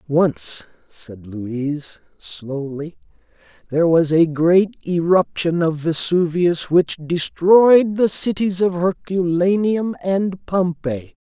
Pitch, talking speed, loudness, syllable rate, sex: 165 Hz, 100 wpm, -18 LUFS, 3.3 syllables/s, male